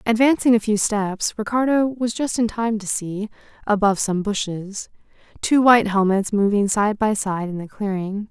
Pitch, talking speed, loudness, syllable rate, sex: 210 Hz, 175 wpm, -20 LUFS, 4.8 syllables/s, female